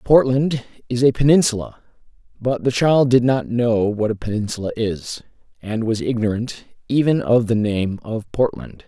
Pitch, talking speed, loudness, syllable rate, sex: 115 Hz, 155 wpm, -19 LUFS, 4.7 syllables/s, male